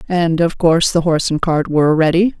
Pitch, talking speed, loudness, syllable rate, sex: 165 Hz, 225 wpm, -15 LUFS, 5.9 syllables/s, female